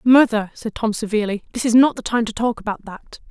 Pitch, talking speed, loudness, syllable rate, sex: 225 Hz, 235 wpm, -19 LUFS, 6.0 syllables/s, female